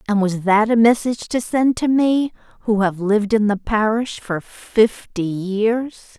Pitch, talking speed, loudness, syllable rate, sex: 220 Hz, 175 wpm, -18 LUFS, 4.2 syllables/s, female